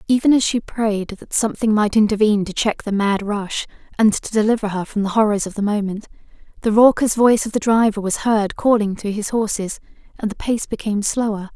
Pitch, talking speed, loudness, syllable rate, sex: 215 Hz, 210 wpm, -19 LUFS, 5.7 syllables/s, female